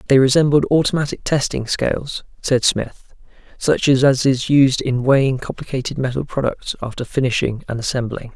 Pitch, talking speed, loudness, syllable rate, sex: 130 Hz, 145 wpm, -18 LUFS, 5.2 syllables/s, male